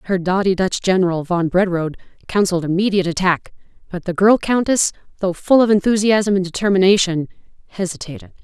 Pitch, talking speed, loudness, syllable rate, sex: 190 Hz, 140 wpm, -17 LUFS, 6.2 syllables/s, female